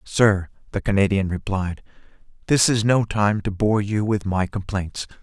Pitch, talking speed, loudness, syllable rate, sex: 100 Hz, 160 wpm, -21 LUFS, 4.4 syllables/s, male